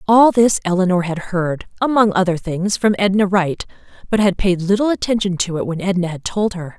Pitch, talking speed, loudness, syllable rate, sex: 190 Hz, 205 wpm, -17 LUFS, 5.3 syllables/s, female